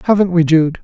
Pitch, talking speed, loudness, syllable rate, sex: 170 Hz, 215 wpm, -13 LUFS, 6.0 syllables/s, male